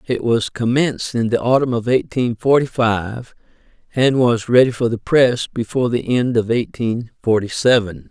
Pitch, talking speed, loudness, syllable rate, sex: 120 Hz, 170 wpm, -17 LUFS, 4.7 syllables/s, male